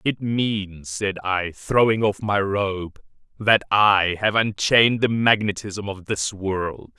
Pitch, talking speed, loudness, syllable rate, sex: 100 Hz, 145 wpm, -21 LUFS, 3.5 syllables/s, male